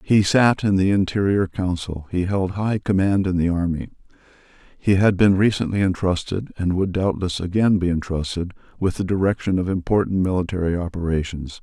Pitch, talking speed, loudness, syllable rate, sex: 95 Hz, 160 wpm, -21 LUFS, 5.3 syllables/s, male